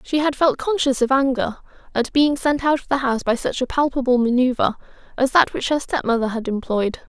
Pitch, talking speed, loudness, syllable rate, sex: 265 Hz, 210 wpm, -20 LUFS, 5.6 syllables/s, female